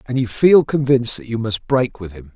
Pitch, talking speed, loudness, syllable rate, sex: 120 Hz, 255 wpm, -17 LUFS, 5.4 syllables/s, male